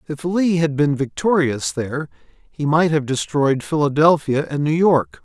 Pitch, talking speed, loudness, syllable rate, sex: 150 Hz, 160 wpm, -19 LUFS, 4.5 syllables/s, male